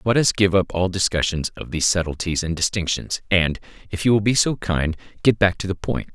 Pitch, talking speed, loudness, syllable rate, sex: 95 Hz, 235 wpm, -21 LUFS, 6.0 syllables/s, male